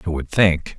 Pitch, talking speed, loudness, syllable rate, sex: 85 Hz, 230 wpm, -18 LUFS, 5.9 syllables/s, male